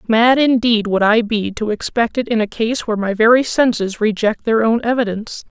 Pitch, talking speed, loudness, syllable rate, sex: 225 Hz, 205 wpm, -16 LUFS, 5.3 syllables/s, female